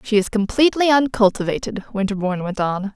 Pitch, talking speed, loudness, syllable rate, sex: 215 Hz, 140 wpm, -19 LUFS, 6.1 syllables/s, female